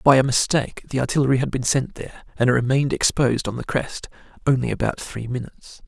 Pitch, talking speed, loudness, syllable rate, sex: 130 Hz, 205 wpm, -21 LUFS, 6.6 syllables/s, male